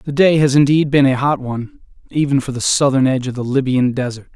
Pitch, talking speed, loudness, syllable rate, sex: 135 Hz, 235 wpm, -16 LUFS, 6.0 syllables/s, male